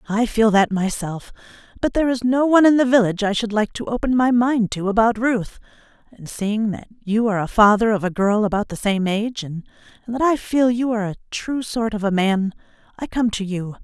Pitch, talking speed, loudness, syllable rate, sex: 220 Hz, 220 wpm, -19 LUFS, 5.5 syllables/s, female